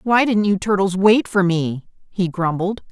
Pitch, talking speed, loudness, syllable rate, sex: 195 Hz, 185 wpm, -18 LUFS, 4.3 syllables/s, female